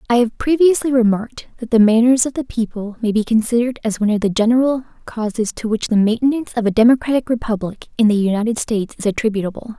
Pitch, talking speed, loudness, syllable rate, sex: 230 Hz, 200 wpm, -17 LUFS, 6.8 syllables/s, female